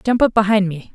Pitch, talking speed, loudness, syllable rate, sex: 205 Hz, 255 wpm, -16 LUFS, 6.0 syllables/s, female